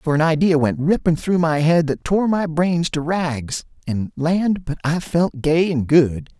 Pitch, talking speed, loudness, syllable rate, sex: 160 Hz, 195 wpm, -19 LUFS, 4.0 syllables/s, male